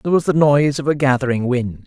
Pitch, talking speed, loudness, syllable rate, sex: 135 Hz, 260 wpm, -17 LUFS, 6.6 syllables/s, male